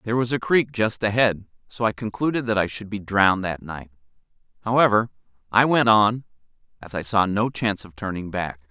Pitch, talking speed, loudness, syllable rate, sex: 105 Hz, 195 wpm, -22 LUFS, 5.6 syllables/s, male